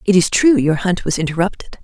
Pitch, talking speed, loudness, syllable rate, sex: 185 Hz, 230 wpm, -16 LUFS, 5.9 syllables/s, female